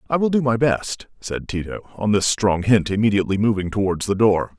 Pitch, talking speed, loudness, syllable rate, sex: 105 Hz, 195 wpm, -20 LUFS, 5.5 syllables/s, male